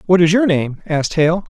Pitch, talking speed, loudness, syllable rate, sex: 170 Hz, 230 wpm, -16 LUFS, 5.4 syllables/s, male